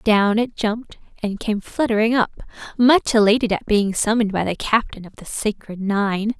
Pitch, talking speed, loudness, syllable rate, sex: 215 Hz, 180 wpm, -20 LUFS, 4.8 syllables/s, female